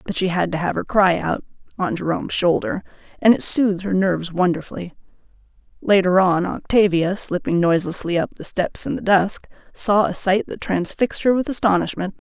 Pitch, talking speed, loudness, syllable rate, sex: 185 Hz, 165 wpm, -19 LUFS, 5.5 syllables/s, female